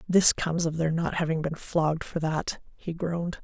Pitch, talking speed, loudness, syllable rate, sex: 165 Hz, 210 wpm, -27 LUFS, 5.1 syllables/s, female